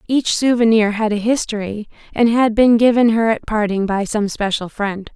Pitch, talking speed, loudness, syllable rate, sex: 220 Hz, 185 wpm, -16 LUFS, 4.9 syllables/s, female